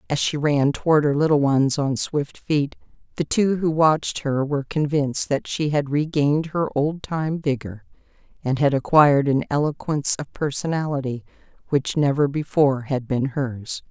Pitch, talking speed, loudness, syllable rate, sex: 145 Hz, 165 wpm, -21 LUFS, 4.9 syllables/s, female